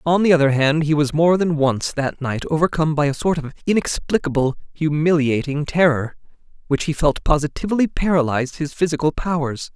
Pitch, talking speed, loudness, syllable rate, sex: 155 Hz, 165 wpm, -19 LUFS, 5.6 syllables/s, male